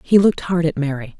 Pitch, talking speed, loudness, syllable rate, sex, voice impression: 160 Hz, 250 wpm, -18 LUFS, 6.4 syllables/s, female, feminine, adult-like, slightly thin, tensed, slightly hard, very clear, slightly cool, intellectual, refreshing, sincere, slightly calm, elegant, slightly strict, slightly sharp